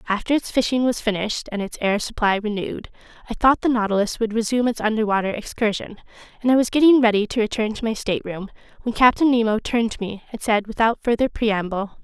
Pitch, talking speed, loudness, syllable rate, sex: 220 Hz, 200 wpm, -21 LUFS, 6.4 syllables/s, female